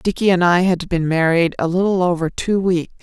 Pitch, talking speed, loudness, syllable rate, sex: 175 Hz, 220 wpm, -17 LUFS, 5.2 syllables/s, female